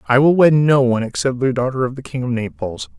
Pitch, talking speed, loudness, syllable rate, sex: 130 Hz, 260 wpm, -17 LUFS, 6.2 syllables/s, male